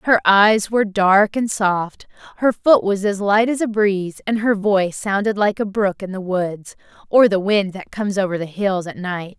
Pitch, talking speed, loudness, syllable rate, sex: 200 Hz, 215 wpm, -18 LUFS, 4.7 syllables/s, female